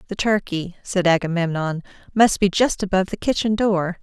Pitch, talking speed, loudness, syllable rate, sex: 190 Hz, 165 wpm, -20 LUFS, 5.3 syllables/s, female